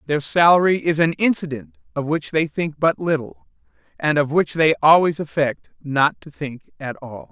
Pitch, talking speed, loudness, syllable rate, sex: 155 Hz, 180 wpm, -19 LUFS, 4.7 syllables/s, male